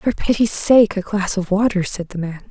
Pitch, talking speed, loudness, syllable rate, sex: 200 Hz, 240 wpm, -18 LUFS, 5.0 syllables/s, female